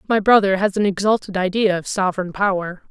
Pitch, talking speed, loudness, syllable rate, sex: 195 Hz, 185 wpm, -18 LUFS, 6.0 syllables/s, female